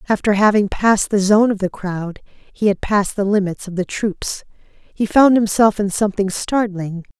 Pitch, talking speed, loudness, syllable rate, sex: 205 Hz, 185 wpm, -17 LUFS, 4.6 syllables/s, female